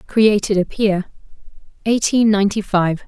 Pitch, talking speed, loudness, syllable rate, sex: 205 Hz, 115 wpm, -17 LUFS, 4.7 syllables/s, female